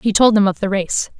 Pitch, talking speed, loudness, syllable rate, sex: 205 Hz, 300 wpm, -16 LUFS, 5.5 syllables/s, female